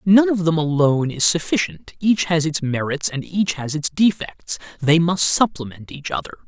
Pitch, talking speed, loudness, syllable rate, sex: 160 Hz, 185 wpm, -19 LUFS, 4.9 syllables/s, male